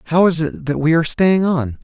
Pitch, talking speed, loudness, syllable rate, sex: 145 Hz, 260 wpm, -16 LUFS, 5.6 syllables/s, male